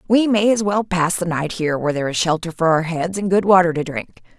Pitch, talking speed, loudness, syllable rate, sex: 175 Hz, 275 wpm, -18 LUFS, 6.1 syllables/s, female